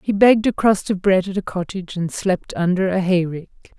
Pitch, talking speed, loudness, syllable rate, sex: 190 Hz, 220 wpm, -19 LUFS, 5.5 syllables/s, female